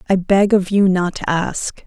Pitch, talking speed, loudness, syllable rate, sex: 190 Hz, 225 wpm, -17 LUFS, 4.2 syllables/s, female